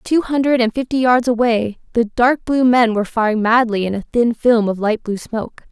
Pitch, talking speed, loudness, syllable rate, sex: 235 Hz, 220 wpm, -16 LUFS, 5.2 syllables/s, female